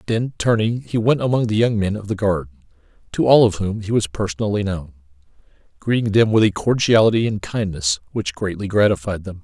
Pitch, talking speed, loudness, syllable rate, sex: 100 Hz, 190 wpm, -19 LUFS, 5.7 syllables/s, male